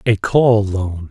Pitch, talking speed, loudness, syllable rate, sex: 105 Hz, 160 wpm, -16 LUFS, 3.0 syllables/s, male